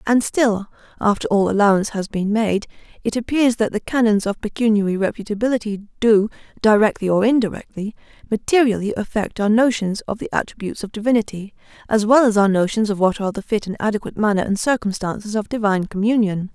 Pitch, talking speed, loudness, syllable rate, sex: 215 Hz, 170 wpm, -19 LUFS, 6.2 syllables/s, female